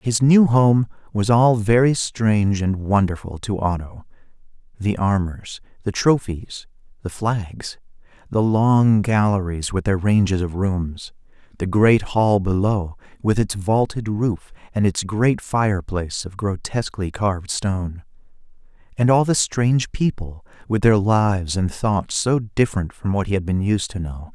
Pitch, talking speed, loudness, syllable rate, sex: 105 Hz, 150 wpm, -20 LUFS, 4.3 syllables/s, male